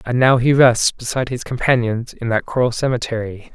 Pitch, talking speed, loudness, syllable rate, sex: 120 Hz, 185 wpm, -17 LUFS, 5.5 syllables/s, male